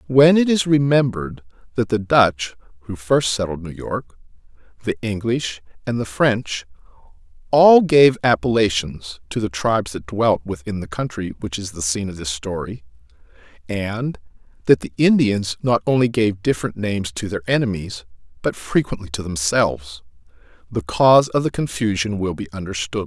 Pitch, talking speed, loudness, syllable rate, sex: 105 Hz, 155 wpm, -19 LUFS, 4.8 syllables/s, male